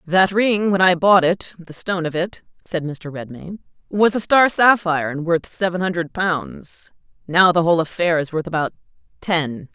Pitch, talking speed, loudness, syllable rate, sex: 175 Hz, 180 wpm, -18 LUFS, 4.8 syllables/s, female